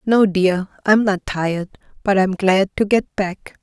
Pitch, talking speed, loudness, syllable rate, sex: 195 Hz, 165 wpm, -18 LUFS, 4.0 syllables/s, female